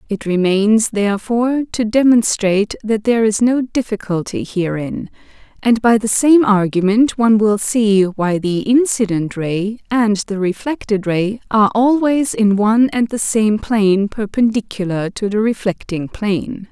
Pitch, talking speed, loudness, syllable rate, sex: 215 Hz, 145 wpm, -16 LUFS, 4.5 syllables/s, female